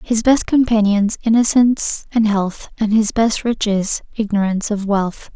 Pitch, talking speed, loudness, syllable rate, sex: 215 Hz, 145 wpm, -17 LUFS, 4.4 syllables/s, female